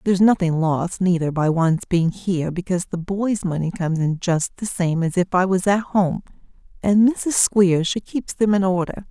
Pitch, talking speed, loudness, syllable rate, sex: 185 Hz, 205 wpm, -20 LUFS, 4.9 syllables/s, female